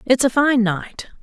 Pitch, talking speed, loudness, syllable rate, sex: 245 Hz, 195 wpm, -18 LUFS, 4.1 syllables/s, female